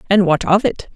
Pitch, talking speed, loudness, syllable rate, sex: 190 Hz, 250 wpm, -16 LUFS, 5.6 syllables/s, female